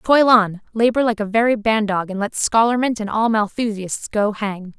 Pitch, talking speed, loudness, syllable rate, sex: 220 Hz, 190 wpm, -18 LUFS, 4.9 syllables/s, female